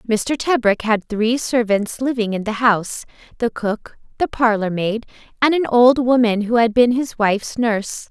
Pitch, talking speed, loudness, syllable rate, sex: 230 Hz, 180 wpm, -18 LUFS, 4.6 syllables/s, female